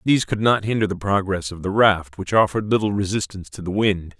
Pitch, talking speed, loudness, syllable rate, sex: 100 Hz, 230 wpm, -21 LUFS, 6.1 syllables/s, male